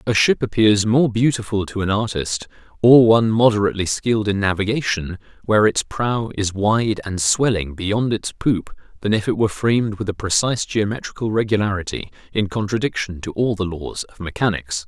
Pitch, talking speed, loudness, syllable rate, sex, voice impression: 105 Hz, 170 wpm, -19 LUFS, 5.4 syllables/s, male, masculine, middle-aged, thick, tensed, powerful, hard, slightly raspy, intellectual, calm, mature, wild, lively, strict